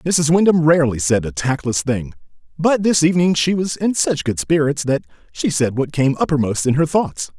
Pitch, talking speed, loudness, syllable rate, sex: 150 Hz, 205 wpm, -17 LUFS, 5.2 syllables/s, male